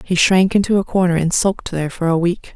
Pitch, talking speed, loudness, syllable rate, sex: 180 Hz, 260 wpm, -17 LUFS, 6.1 syllables/s, female